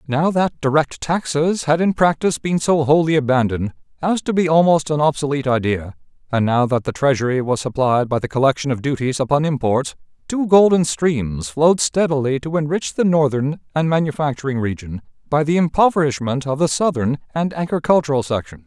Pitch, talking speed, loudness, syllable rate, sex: 145 Hz, 170 wpm, -18 LUFS, 5.6 syllables/s, male